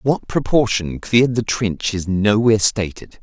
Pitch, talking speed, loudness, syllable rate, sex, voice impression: 110 Hz, 150 wpm, -18 LUFS, 4.4 syllables/s, male, masculine, adult-like, slightly clear, refreshing, sincere, friendly